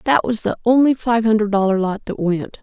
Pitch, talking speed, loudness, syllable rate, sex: 220 Hz, 230 wpm, -17 LUFS, 5.5 syllables/s, female